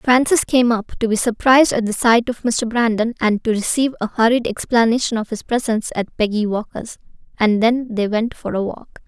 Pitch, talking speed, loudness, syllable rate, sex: 230 Hz, 205 wpm, -18 LUFS, 5.4 syllables/s, female